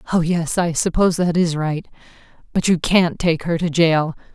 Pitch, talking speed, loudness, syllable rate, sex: 165 Hz, 195 wpm, -19 LUFS, 4.9 syllables/s, female